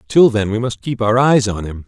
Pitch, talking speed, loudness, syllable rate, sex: 115 Hz, 290 wpm, -16 LUFS, 5.3 syllables/s, male